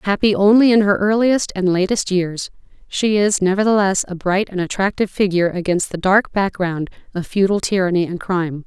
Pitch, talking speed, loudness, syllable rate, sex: 190 Hz, 175 wpm, -17 LUFS, 5.4 syllables/s, female